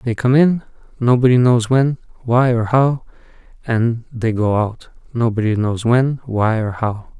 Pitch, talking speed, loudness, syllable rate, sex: 120 Hz, 160 wpm, -17 LUFS, 4.2 syllables/s, male